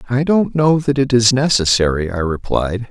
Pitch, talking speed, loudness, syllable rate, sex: 120 Hz, 185 wpm, -15 LUFS, 4.8 syllables/s, male